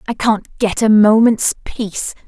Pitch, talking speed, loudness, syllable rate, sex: 215 Hz, 160 wpm, -15 LUFS, 4.1 syllables/s, female